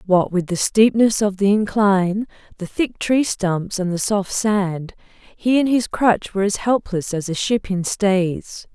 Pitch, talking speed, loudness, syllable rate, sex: 200 Hz, 185 wpm, -19 LUFS, 4.0 syllables/s, female